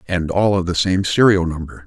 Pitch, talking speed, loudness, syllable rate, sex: 90 Hz, 225 wpm, -17 LUFS, 5.2 syllables/s, male